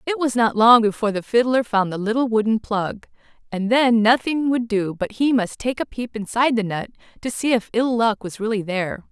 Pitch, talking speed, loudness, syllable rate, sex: 225 Hz, 225 wpm, -20 LUFS, 5.4 syllables/s, female